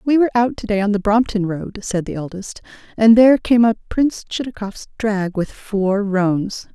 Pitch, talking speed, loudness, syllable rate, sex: 210 Hz, 195 wpm, -18 LUFS, 4.9 syllables/s, female